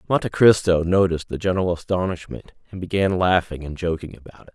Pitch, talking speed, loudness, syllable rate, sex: 90 Hz, 170 wpm, -21 LUFS, 6.3 syllables/s, male